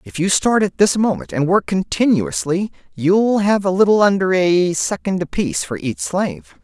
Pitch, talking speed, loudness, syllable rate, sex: 170 Hz, 180 wpm, -17 LUFS, 4.7 syllables/s, male